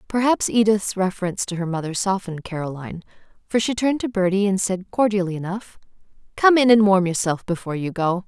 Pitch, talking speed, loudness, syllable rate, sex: 195 Hz, 180 wpm, -21 LUFS, 6.2 syllables/s, female